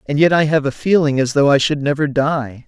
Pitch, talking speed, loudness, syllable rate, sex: 145 Hz, 270 wpm, -16 LUFS, 5.5 syllables/s, male